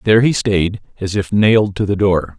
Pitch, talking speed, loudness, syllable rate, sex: 100 Hz, 225 wpm, -15 LUFS, 5.3 syllables/s, male